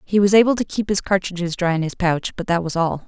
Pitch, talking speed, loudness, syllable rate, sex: 185 Hz, 295 wpm, -19 LUFS, 6.1 syllables/s, female